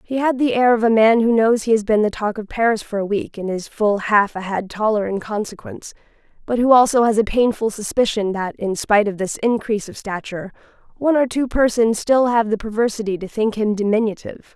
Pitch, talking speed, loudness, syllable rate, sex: 220 Hz, 225 wpm, -18 LUFS, 5.8 syllables/s, female